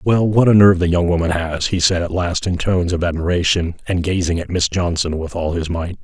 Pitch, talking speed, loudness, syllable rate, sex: 90 Hz, 250 wpm, -17 LUFS, 5.7 syllables/s, male